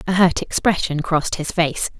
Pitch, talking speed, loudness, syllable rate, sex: 170 Hz, 180 wpm, -19 LUFS, 5.0 syllables/s, female